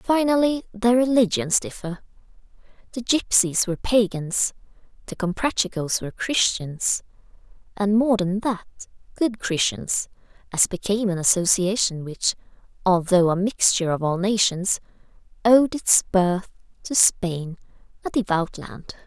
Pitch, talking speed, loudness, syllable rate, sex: 200 Hz, 115 wpm, -21 LUFS, 4.4 syllables/s, female